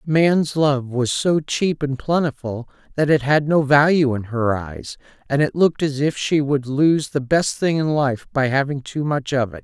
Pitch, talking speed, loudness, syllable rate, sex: 140 Hz, 210 wpm, -19 LUFS, 4.4 syllables/s, male